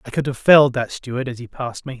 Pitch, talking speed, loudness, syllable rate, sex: 130 Hz, 300 wpm, -19 LUFS, 7.0 syllables/s, male